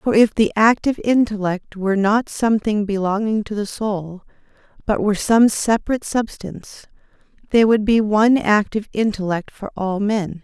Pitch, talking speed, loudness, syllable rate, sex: 210 Hz, 150 wpm, -18 LUFS, 5.2 syllables/s, female